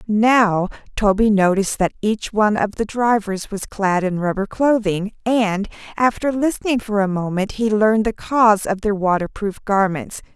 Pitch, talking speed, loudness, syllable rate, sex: 210 Hz, 170 wpm, -19 LUFS, 4.7 syllables/s, female